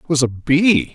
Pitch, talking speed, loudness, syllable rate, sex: 145 Hz, 255 wpm, -16 LUFS, 4.8 syllables/s, male